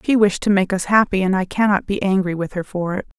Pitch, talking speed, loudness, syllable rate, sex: 195 Hz, 285 wpm, -19 LUFS, 6.1 syllables/s, female